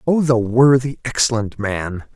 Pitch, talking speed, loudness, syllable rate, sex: 120 Hz, 140 wpm, -17 LUFS, 4.2 syllables/s, male